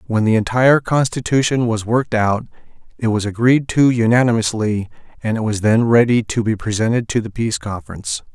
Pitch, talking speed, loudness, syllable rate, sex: 115 Hz, 175 wpm, -17 LUFS, 5.8 syllables/s, male